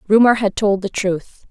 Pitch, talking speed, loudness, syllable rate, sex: 205 Hz, 200 wpm, -17 LUFS, 4.5 syllables/s, female